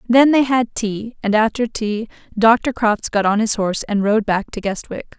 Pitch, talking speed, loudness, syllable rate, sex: 220 Hz, 210 wpm, -18 LUFS, 4.6 syllables/s, female